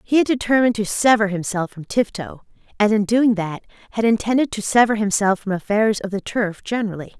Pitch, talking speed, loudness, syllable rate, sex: 210 Hz, 190 wpm, -19 LUFS, 5.8 syllables/s, female